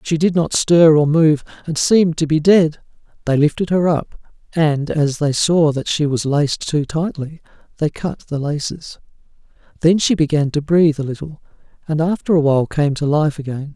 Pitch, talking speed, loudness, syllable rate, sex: 155 Hz, 190 wpm, -17 LUFS, 5.0 syllables/s, male